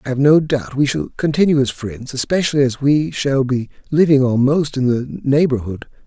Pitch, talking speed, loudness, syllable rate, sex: 135 Hz, 190 wpm, -17 LUFS, 5.0 syllables/s, male